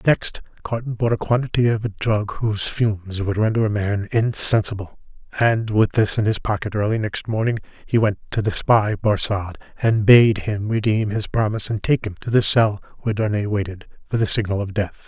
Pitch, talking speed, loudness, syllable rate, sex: 105 Hz, 200 wpm, -20 LUFS, 5.3 syllables/s, male